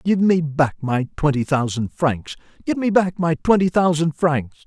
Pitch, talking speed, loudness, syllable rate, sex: 160 Hz, 180 wpm, -20 LUFS, 4.4 syllables/s, male